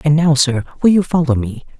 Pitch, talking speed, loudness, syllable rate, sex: 150 Hz, 235 wpm, -15 LUFS, 5.6 syllables/s, male